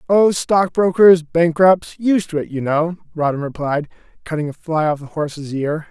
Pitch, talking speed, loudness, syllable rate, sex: 165 Hz, 150 wpm, -17 LUFS, 4.6 syllables/s, male